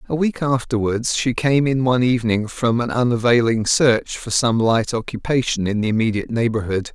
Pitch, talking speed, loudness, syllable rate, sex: 120 Hz, 175 wpm, -19 LUFS, 5.3 syllables/s, male